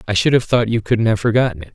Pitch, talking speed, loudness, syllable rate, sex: 110 Hz, 310 wpm, -17 LUFS, 6.8 syllables/s, male